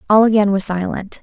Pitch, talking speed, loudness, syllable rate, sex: 205 Hz, 195 wpm, -16 LUFS, 5.8 syllables/s, female